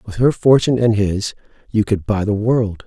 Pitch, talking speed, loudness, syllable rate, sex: 110 Hz, 190 wpm, -17 LUFS, 5.0 syllables/s, male